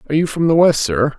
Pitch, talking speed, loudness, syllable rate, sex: 150 Hz, 305 wpm, -15 LUFS, 7.1 syllables/s, male